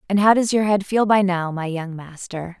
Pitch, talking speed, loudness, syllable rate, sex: 190 Hz, 255 wpm, -19 LUFS, 5.0 syllables/s, female